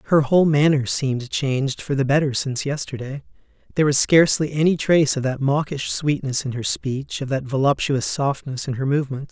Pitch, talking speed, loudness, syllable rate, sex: 140 Hz, 185 wpm, -21 LUFS, 5.7 syllables/s, male